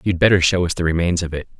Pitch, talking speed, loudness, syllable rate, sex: 85 Hz, 300 wpm, -18 LUFS, 7.1 syllables/s, male